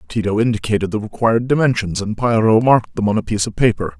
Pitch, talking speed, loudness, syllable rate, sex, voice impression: 110 Hz, 210 wpm, -17 LUFS, 6.8 syllables/s, male, masculine, slightly old, thick, very tensed, powerful, very bright, soft, very clear, very fluent, very cool, intellectual, very refreshing, very sincere, very calm, very mature, friendly, reassuring, very unique, elegant, very wild, very sweet, lively, kind, intense